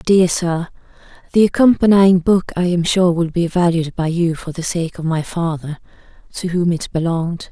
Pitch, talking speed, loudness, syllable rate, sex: 170 Hz, 175 wpm, -17 LUFS, 4.8 syllables/s, female